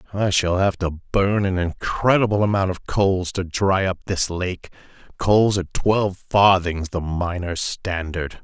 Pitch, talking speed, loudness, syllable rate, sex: 95 Hz, 150 wpm, -21 LUFS, 4.3 syllables/s, male